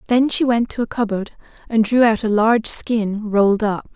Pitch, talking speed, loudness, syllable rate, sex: 220 Hz, 210 wpm, -18 LUFS, 5.0 syllables/s, female